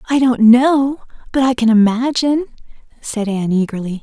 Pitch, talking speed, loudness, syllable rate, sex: 240 Hz, 150 wpm, -15 LUFS, 5.4 syllables/s, female